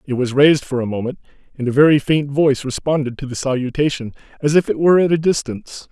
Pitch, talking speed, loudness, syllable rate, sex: 140 Hz, 225 wpm, -17 LUFS, 6.6 syllables/s, male